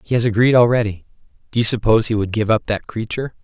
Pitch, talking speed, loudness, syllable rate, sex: 110 Hz, 225 wpm, -17 LUFS, 7.1 syllables/s, male